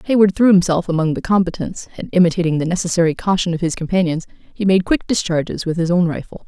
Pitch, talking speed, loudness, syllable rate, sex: 175 Hz, 205 wpm, -17 LUFS, 6.5 syllables/s, female